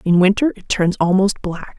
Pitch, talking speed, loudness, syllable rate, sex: 190 Hz, 200 wpm, -17 LUFS, 4.9 syllables/s, female